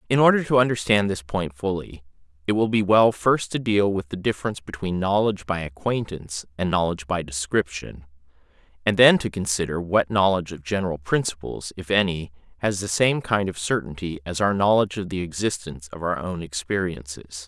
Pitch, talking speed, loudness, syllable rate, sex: 95 Hz, 180 wpm, -23 LUFS, 5.7 syllables/s, male